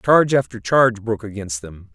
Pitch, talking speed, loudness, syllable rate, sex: 110 Hz, 185 wpm, -19 LUFS, 6.0 syllables/s, male